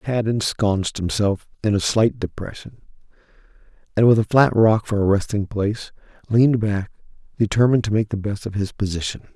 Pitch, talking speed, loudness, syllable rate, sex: 105 Hz, 165 wpm, -20 LUFS, 5.8 syllables/s, male